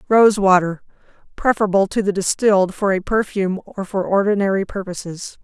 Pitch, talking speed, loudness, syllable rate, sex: 195 Hz, 135 wpm, -18 LUFS, 5.6 syllables/s, female